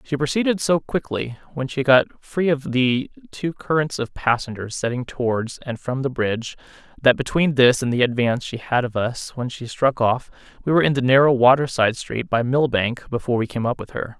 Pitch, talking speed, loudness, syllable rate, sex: 130 Hz, 210 wpm, -21 LUFS, 5.2 syllables/s, male